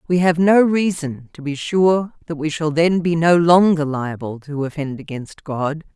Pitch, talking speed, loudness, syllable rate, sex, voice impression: 160 Hz, 190 wpm, -18 LUFS, 4.3 syllables/s, female, very feminine, very middle-aged, slightly thick, tensed, powerful, bright, soft, clear, fluent, slightly raspy, cool, intellectual, refreshing, slightly sincere, calm, friendly, reassuring, very unique, elegant, wild, slightly sweet, very lively, kind, slightly intense